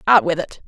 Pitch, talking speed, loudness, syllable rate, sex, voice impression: 175 Hz, 270 wpm, -18 LUFS, 6.0 syllables/s, female, feminine, slightly adult-like, slightly tensed, clear, fluent, slightly unique, slightly intense